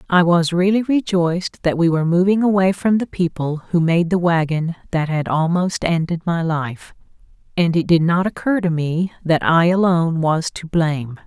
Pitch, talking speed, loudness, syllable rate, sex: 170 Hz, 185 wpm, -18 LUFS, 4.9 syllables/s, female